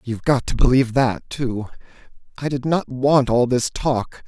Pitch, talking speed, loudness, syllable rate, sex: 125 Hz, 185 wpm, -20 LUFS, 4.6 syllables/s, male